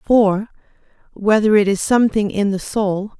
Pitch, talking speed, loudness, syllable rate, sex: 205 Hz, 150 wpm, -17 LUFS, 5.4 syllables/s, female